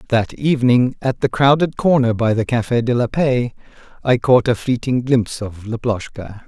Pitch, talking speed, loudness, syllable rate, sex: 120 Hz, 175 wpm, -17 LUFS, 4.9 syllables/s, male